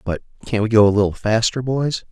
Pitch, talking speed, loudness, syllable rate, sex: 110 Hz, 225 wpm, -18 LUFS, 5.7 syllables/s, male